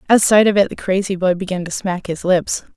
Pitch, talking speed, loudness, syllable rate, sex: 190 Hz, 260 wpm, -17 LUFS, 5.6 syllables/s, female